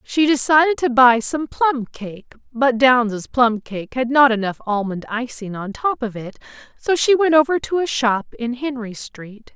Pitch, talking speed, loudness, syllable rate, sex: 250 Hz, 175 wpm, -18 LUFS, 4.6 syllables/s, female